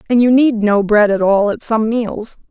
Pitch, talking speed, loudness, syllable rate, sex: 220 Hz, 240 wpm, -14 LUFS, 4.5 syllables/s, female